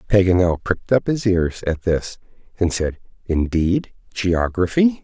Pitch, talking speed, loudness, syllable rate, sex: 95 Hz, 130 wpm, -20 LUFS, 4.3 syllables/s, male